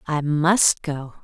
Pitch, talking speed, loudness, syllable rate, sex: 155 Hz, 145 wpm, -20 LUFS, 2.8 syllables/s, female